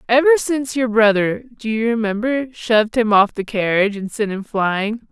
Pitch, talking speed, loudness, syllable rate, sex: 225 Hz, 190 wpm, -18 LUFS, 5.1 syllables/s, female